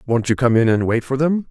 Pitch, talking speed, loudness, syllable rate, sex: 125 Hz, 320 wpm, -17 LUFS, 5.9 syllables/s, male